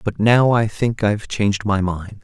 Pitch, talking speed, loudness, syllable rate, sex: 105 Hz, 215 wpm, -18 LUFS, 4.7 syllables/s, male